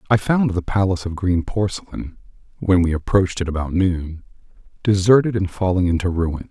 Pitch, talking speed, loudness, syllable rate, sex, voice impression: 95 Hz, 165 wpm, -19 LUFS, 5.4 syllables/s, male, masculine, very adult-like, slightly dark, calm, reassuring, elegant, sweet, kind